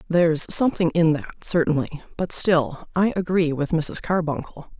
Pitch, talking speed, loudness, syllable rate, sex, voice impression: 165 Hz, 150 wpm, -21 LUFS, 4.8 syllables/s, female, feminine, very adult-like, intellectual, elegant